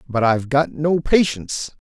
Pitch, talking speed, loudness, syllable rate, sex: 140 Hz, 165 wpm, -19 LUFS, 5.1 syllables/s, male